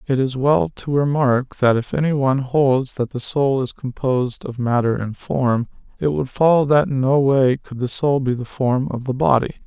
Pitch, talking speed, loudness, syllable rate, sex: 130 Hz, 210 wpm, -19 LUFS, 4.6 syllables/s, male